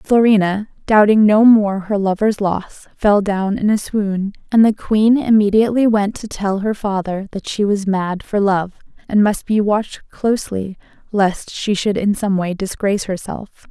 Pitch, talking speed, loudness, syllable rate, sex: 205 Hz, 175 wpm, -16 LUFS, 4.4 syllables/s, female